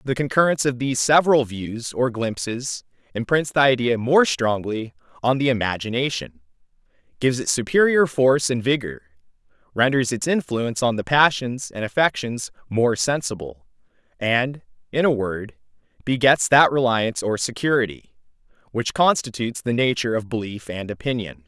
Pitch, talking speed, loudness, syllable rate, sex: 120 Hz, 135 wpm, -21 LUFS, 5.2 syllables/s, male